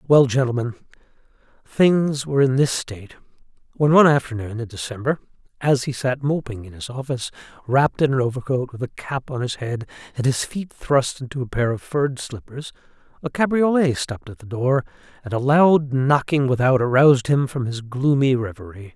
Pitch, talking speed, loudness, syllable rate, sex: 130 Hz, 175 wpm, -21 LUFS, 5.4 syllables/s, male